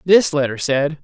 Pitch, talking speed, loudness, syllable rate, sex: 150 Hz, 175 wpm, -17 LUFS, 4.4 syllables/s, male